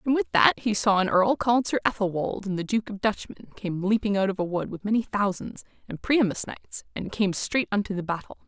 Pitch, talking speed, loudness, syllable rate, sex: 205 Hz, 235 wpm, -25 LUFS, 5.7 syllables/s, female